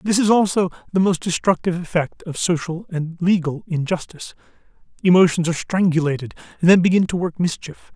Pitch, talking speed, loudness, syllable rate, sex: 175 Hz, 160 wpm, -19 LUFS, 5.9 syllables/s, male